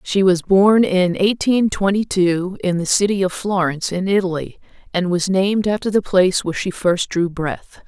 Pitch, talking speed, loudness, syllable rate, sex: 185 Hz, 190 wpm, -18 LUFS, 4.9 syllables/s, female